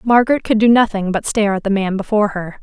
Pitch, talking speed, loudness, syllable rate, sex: 210 Hz, 250 wpm, -16 LUFS, 6.8 syllables/s, female